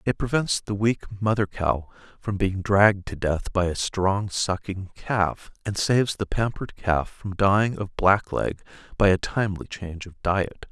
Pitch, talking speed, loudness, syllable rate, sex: 100 Hz, 175 wpm, -24 LUFS, 4.4 syllables/s, male